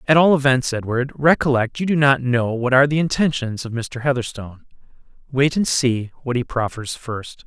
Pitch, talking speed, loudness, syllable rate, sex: 130 Hz, 185 wpm, -19 LUFS, 5.2 syllables/s, male